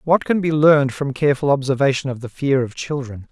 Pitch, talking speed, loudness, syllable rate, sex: 140 Hz, 215 wpm, -18 LUFS, 5.9 syllables/s, male